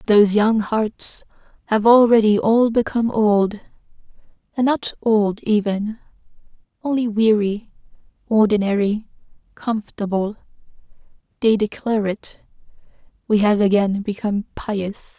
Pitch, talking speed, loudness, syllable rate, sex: 215 Hz, 85 wpm, -19 LUFS, 4.3 syllables/s, female